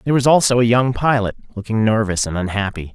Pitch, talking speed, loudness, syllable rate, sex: 115 Hz, 205 wpm, -17 LUFS, 6.5 syllables/s, male